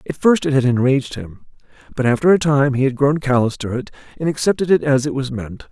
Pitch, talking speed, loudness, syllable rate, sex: 135 Hz, 240 wpm, -17 LUFS, 6.2 syllables/s, male